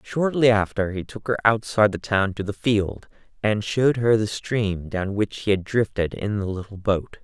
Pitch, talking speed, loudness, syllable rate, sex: 105 Hz, 205 wpm, -23 LUFS, 4.8 syllables/s, male